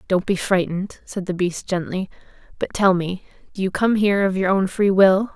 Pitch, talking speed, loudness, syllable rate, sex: 190 Hz, 215 wpm, -20 LUFS, 5.4 syllables/s, female